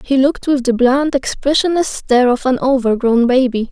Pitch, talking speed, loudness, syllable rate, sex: 260 Hz, 180 wpm, -14 LUFS, 5.3 syllables/s, female